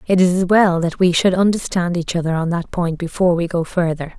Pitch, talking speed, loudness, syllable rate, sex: 175 Hz, 245 wpm, -17 LUFS, 5.8 syllables/s, female